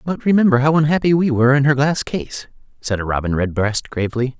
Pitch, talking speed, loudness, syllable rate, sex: 135 Hz, 205 wpm, -17 LUFS, 6.1 syllables/s, male